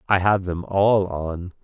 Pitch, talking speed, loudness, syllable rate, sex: 95 Hz, 185 wpm, -21 LUFS, 3.7 syllables/s, male